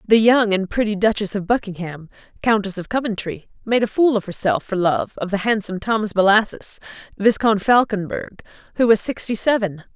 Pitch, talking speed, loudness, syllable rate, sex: 210 Hz, 170 wpm, -19 LUFS, 5.5 syllables/s, female